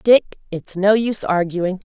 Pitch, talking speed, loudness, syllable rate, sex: 195 Hz, 155 wpm, -18 LUFS, 4.2 syllables/s, female